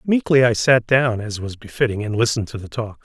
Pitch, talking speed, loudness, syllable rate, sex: 115 Hz, 235 wpm, -19 LUFS, 5.8 syllables/s, male